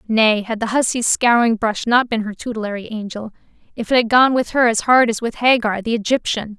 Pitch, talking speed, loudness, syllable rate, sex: 225 Hz, 200 wpm, -17 LUFS, 5.4 syllables/s, female